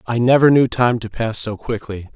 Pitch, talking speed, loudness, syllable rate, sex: 115 Hz, 225 wpm, -17 LUFS, 5.1 syllables/s, male